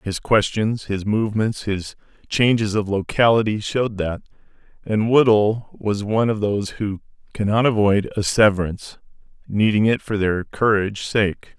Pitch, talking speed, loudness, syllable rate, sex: 105 Hz, 135 wpm, -20 LUFS, 4.8 syllables/s, male